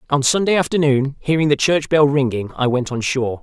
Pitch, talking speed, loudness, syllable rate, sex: 140 Hz, 210 wpm, -17 LUFS, 5.6 syllables/s, male